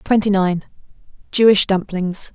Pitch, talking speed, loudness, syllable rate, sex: 195 Hz, 75 wpm, -17 LUFS, 4.2 syllables/s, female